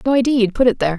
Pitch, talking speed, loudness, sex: 230 Hz, 365 wpm, -16 LUFS, female